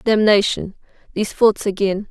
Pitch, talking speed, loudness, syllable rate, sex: 205 Hz, 115 wpm, -18 LUFS, 5.0 syllables/s, female